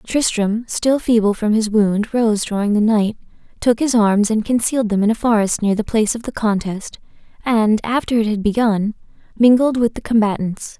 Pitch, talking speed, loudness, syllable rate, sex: 220 Hz, 190 wpm, -17 LUFS, 5.0 syllables/s, female